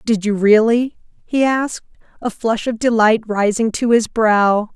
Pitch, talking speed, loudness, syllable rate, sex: 225 Hz, 165 wpm, -16 LUFS, 4.2 syllables/s, female